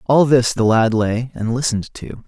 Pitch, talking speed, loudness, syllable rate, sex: 120 Hz, 210 wpm, -17 LUFS, 4.9 syllables/s, male